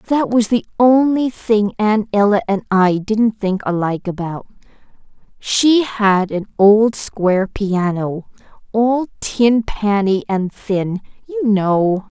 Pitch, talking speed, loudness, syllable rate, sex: 210 Hz, 130 wpm, -16 LUFS, 3.5 syllables/s, female